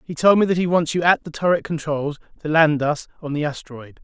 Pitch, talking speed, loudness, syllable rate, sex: 155 Hz, 255 wpm, -20 LUFS, 5.9 syllables/s, male